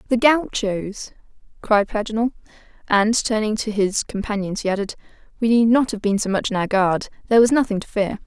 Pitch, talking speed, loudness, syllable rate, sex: 215 Hz, 190 wpm, -20 LUFS, 5.6 syllables/s, female